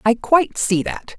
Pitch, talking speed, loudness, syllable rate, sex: 245 Hz, 200 wpm, -18 LUFS, 4.6 syllables/s, female